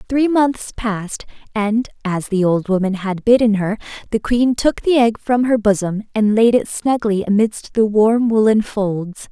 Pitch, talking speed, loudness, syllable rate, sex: 220 Hz, 180 wpm, -17 LUFS, 4.2 syllables/s, female